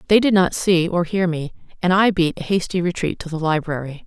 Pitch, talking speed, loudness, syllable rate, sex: 175 Hz, 235 wpm, -19 LUFS, 5.6 syllables/s, female